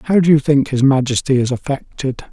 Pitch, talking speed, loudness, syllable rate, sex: 140 Hz, 205 wpm, -16 LUFS, 5.8 syllables/s, male